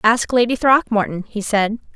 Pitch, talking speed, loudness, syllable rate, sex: 225 Hz, 155 wpm, -18 LUFS, 4.8 syllables/s, female